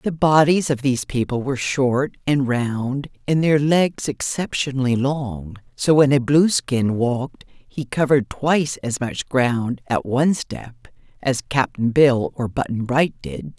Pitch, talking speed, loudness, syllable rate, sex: 135 Hz, 155 wpm, -20 LUFS, 4.0 syllables/s, female